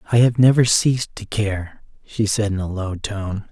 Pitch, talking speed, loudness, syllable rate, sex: 105 Hz, 205 wpm, -19 LUFS, 4.7 syllables/s, male